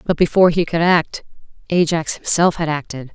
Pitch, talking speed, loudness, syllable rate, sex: 170 Hz, 170 wpm, -17 LUFS, 5.4 syllables/s, female